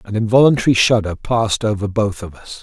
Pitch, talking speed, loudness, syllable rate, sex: 110 Hz, 185 wpm, -16 LUFS, 5.9 syllables/s, male